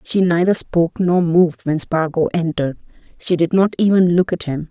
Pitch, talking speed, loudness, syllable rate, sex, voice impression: 170 Hz, 190 wpm, -17 LUFS, 5.3 syllables/s, female, feminine, slightly young, slightly adult-like, very thin, slightly relaxed, slightly weak, slightly dark, hard, clear, cute, intellectual, slightly refreshing, very sincere, very calm, friendly, reassuring, unique, elegant, slightly wild, sweet, slightly lively, kind, slightly modest